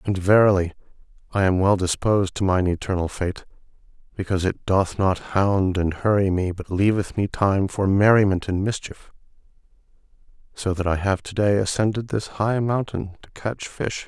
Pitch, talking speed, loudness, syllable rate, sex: 95 Hz, 165 wpm, -22 LUFS, 4.9 syllables/s, male